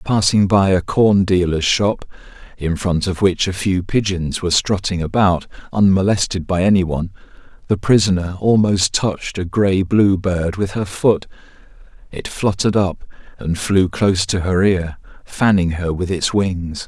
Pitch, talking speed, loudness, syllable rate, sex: 95 Hz, 160 wpm, -17 LUFS, 4.6 syllables/s, male